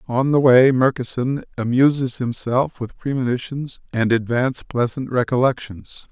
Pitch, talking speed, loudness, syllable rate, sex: 125 Hz, 120 wpm, -19 LUFS, 4.6 syllables/s, male